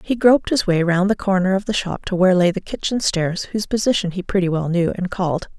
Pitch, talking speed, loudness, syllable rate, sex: 190 Hz, 260 wpm, -19 LUFS, 6.1 syllables/s, female